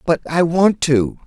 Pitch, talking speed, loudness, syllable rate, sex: 160 Hz, 190 wpm, -16 LUFS, 3.9 syllables/s, male